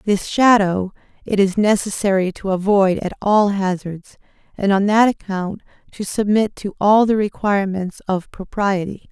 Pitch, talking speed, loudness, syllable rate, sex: 200 Hz, 145 wpm, -18 LUFS, 4.5 syllables/s, female